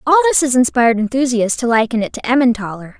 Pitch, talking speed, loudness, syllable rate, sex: 245 Hz, 200 wpm, -15 LUFS, 7.0 syllables/s, female